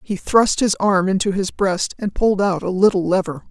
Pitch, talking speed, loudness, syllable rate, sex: 190 Hz, 220 wpm, -18 LUFS, 5.1 syllables/s, female